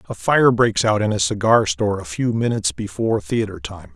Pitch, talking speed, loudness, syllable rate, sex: 105 Hz, 215 wpm, -19 LUFS, 5.6 syllables/s, male